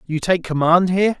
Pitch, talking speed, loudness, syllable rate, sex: 175 Hz, 200 wpm, -17 LUFS, 5.7 syllables/s, male